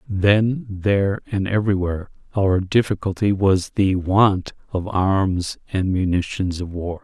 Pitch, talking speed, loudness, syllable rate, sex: 95 Hz, 130 wpm, -20 LUFS, 4.1 syllables/s, male